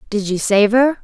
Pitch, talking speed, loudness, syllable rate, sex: 220 Hz, 230 wpm, -15 LUFS, 4.9 syllables/s, female